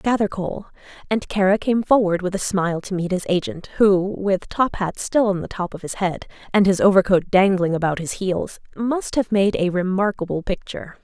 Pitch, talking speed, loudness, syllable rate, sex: 195 Hz, 195 wpm, -20 LUFS, 5.3 syllables/s, female